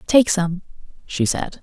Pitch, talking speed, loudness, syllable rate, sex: 190 Hz, 150 wpm, -20 LUFS, 3.8 syllables/s, female